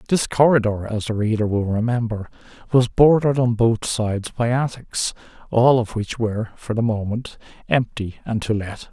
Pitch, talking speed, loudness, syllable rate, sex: 115 Hz, 170 wpm, -20 LUFS, 5.0 syllables/s, male